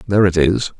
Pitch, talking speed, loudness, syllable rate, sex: 95 Hz, 230 wpm, -15 LUFS, 6.5 syllables/s, male